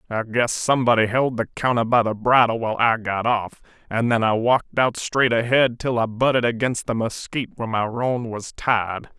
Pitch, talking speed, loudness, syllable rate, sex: 115 Hz, 205 wpm, -21 LUFS, 5.4 syllables/s, male